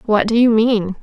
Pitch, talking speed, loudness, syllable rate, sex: 220 Hz, 235 wpm, -15 LUFS, 4.7 syllables/s, female